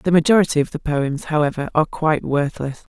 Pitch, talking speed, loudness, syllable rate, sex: 155 Hz, 180 wpm, -19 LUFS, 6.1 syllables/s, female